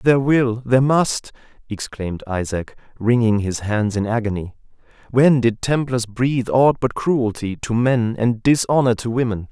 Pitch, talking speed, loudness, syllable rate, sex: 120 Hz, 150 wpm, -19 LUFS, 4.6 syllables/s, male